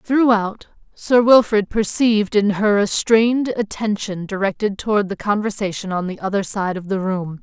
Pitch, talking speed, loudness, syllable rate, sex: 205 Hz, 160 wpm, -18 LUFS, 4.8 syllables/s, female